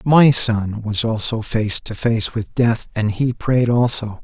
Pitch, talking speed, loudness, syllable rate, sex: 115 Hz, 185 wpm, -18 LUFS, 3.7 syllables/s, male